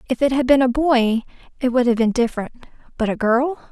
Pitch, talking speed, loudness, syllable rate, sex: 250 Hz, 210 wpm, -19 LUFS, 6.2 syllables/s, female